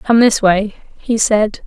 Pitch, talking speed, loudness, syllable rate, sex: 215 Hz, 180 wpm, -14 LUFS, 3.6 syllables/s, female